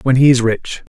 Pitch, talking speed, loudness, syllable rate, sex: 125 Hz, 255 wpm, -14 LUFS, 5.3 syllables/s, male